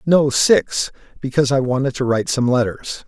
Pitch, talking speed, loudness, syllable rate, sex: 130 Hz, 155 wpm, -18 LUFS, 5.3 syllables/s, male